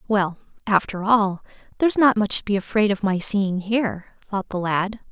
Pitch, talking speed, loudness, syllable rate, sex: 205 Hz, 190 wpm, -21 LUFS, 4.9 syllables/s, female